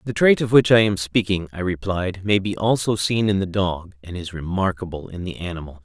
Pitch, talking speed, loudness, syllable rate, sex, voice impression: 95 Hz, 225 wpm, -21 LUFS, 5.4 syllables/s, male, very masculine, very adult-like, thick, tensed, slightly weak, slightly bright, slightly hard, slightly muffled, fluent, slightly raspy, cool, very intellectual, refreshing, sincere, very calm, mature, very friendly, very reassuring, very unique, elegant, wild, sweet, lively, strict, slightly intense, slightly modest